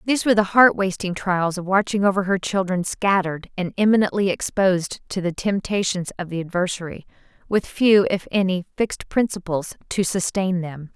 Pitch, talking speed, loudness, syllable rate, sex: 190 Hz, 165 wpm, -21 LUFS, 5.4 syllables/s, female